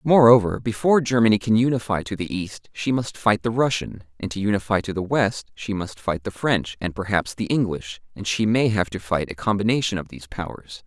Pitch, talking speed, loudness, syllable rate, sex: 105 Hz, 215 wpm, -22 LUFS, 5.5 syllables/s, male